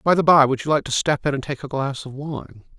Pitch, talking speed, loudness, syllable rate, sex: 140 Hz, 325 wpm, -20 LUFS, 5.9 syllables/s, male